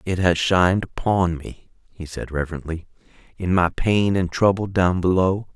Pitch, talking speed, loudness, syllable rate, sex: 90 Hz, 160 wpm, -21 LUFS, 4.7 syllables/s, male